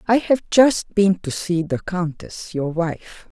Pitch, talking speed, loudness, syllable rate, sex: 185 Hz, 175 wpm, -20 LUFS, 3.5 syllables/s, female